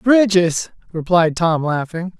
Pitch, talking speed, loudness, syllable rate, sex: 175 Hz, 110 wpm, -17 LUFS, 3.6 syllables/s, male